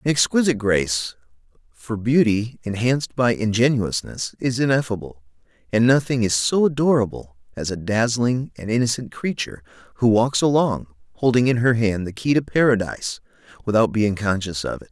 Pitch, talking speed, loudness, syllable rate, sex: 115 Hz, 150 wpm, -21 LUFS, 5.3 syllables/s, male